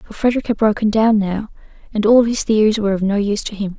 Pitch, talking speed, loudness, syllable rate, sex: 215 Hz, 255 wpm, -17 LUFS, 6.6 syllables/s, female